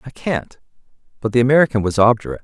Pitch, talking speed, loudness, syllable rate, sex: 115 Hz, 170 wpm, -17 LUFS, 7.6 syllables/s, male